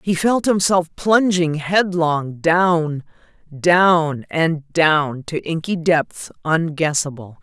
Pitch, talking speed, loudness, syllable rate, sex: 165 Hz, 105 wpm, -18 LUFS, 3.0 syllables/s, female